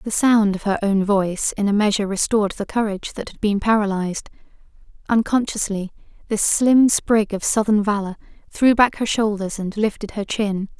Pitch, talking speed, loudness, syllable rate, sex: 210 Hz, 170 wpm, -20 LUFS, 5.3 syllables/s, female